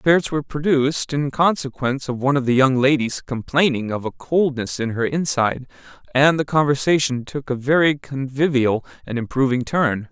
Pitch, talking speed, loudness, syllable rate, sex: 135 Hz, 165 wpm, -20 LUFS, 5.3 syllables/s, male